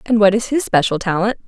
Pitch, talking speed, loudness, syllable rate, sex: 210 Hz, 245 wpm, -16 LUFS, 6.9 syllables/s, female